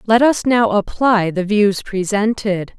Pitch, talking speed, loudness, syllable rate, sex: 210 Hz, 150 wpm, -16 LUFS, 3.8 syllables/s, female